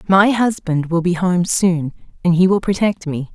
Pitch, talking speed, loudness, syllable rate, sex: 180 Hz, 195 wpm, -17 LUFS, 4.6 syllables/s, female